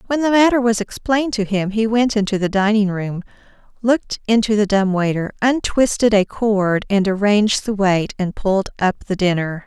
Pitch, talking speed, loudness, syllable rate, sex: 210 Hz, 185 wpm, -18 LUFS, 5.1 syllables/s, female